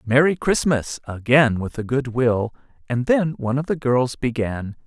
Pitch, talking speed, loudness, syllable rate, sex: 130 Hz, 175 wpm, -21 LUFS, 4.5 syllables/s, male